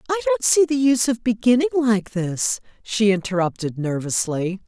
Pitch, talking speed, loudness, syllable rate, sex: 230 Hz, 155 wpm, -20 LUFS, 4.8 syllables/s, female